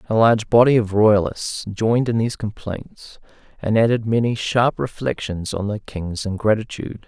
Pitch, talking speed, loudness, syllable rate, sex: 110 Hz, 155 wpm, -20 LUFS, 4.9 syllables/s, male